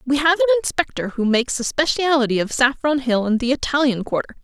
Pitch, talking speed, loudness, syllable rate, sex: 270 Hz, 205 wpm, -19 LUFS, 6.0 syllables/s, female